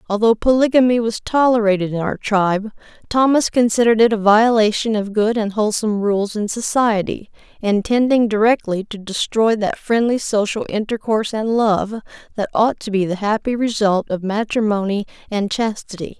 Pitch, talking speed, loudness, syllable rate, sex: 215 Hz, 150 wpm, -18 LUFS, 5.2 syllables/s, female